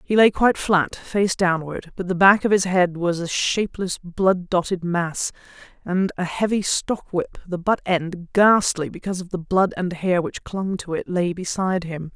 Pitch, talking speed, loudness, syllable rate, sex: 180 Hz, 195 wpm, -21 LUFS, 4.6 syllables/s, female